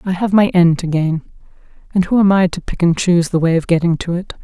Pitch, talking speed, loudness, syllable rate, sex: 175 Hz, 255 wpm, -15 LUFS, 6.1 syllables/s, female